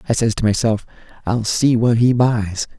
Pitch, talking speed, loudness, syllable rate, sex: 115 Hz, 195 wpm, -17 LUFS, 4.7 syllables/s, male